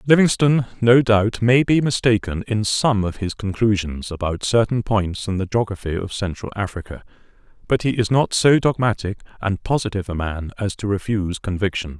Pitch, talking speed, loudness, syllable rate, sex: 105 Hz, 170 wpm, -20 LUFS, 5.4 syllables/s, male